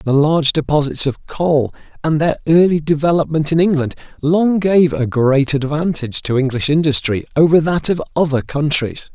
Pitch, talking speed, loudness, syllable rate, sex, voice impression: 150 Hz, 155 wpm, -16 LUFS, 5.1 syllables/s, male, masculine, middle-aged, tensed, powerful, bright, muffled, slightly raspy, mature, friendly, unique, wild, lively, strict, slightly intense